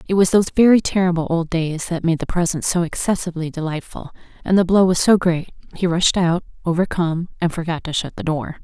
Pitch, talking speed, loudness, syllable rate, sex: 170 Hz, 210 wpm, -19 LUFS, 5.9 syllables/s, female